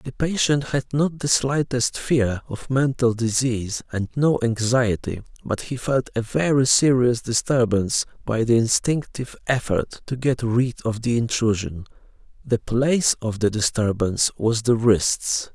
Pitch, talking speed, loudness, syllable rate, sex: 120 Hz, 145 wpm, -21 LUFS, 4.3 syllables/s, male